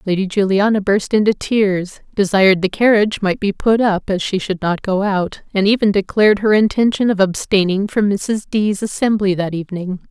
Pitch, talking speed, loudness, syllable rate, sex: 200 Hz, 185 wpm, -16 LUFS, 5.2 syllables/s, female